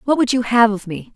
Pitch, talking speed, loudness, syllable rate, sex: 230 Hz, 310 wpm, -16 LUFS, 5.8 syllables/s, female